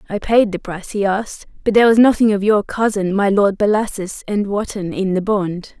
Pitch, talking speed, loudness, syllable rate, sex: 205 Hz, 215 wpm, -17 LUFS, 5.4 syllables/s, female